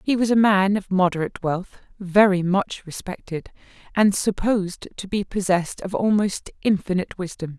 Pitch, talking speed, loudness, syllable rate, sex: 190 Hz, 150 wpm, -22 LUFS, 5.0 syllables/s, female